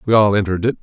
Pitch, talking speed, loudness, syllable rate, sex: 105 Hz, 290 wpm, -16 LUFS, 8.8 syllables/s, male